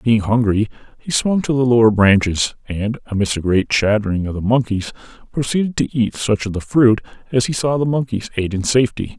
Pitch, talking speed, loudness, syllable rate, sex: 115 Hz, 205 wpm, -18 LUFS, 5.6 syllables/s, male